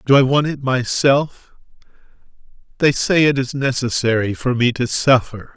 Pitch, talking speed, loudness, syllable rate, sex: 130 Hz, 150 wpm, -17 LUFS, 4.6 syllables/s, male